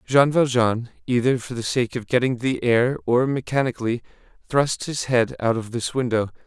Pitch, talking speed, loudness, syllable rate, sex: 125 Hz, 175 wpm, -22 LUFS, 4.9 syllables/s, male